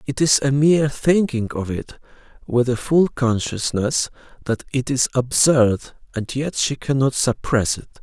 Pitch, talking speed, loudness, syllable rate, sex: 130 Hz, 155 wpm, -20 LUFS, 4.2 syllables/s, male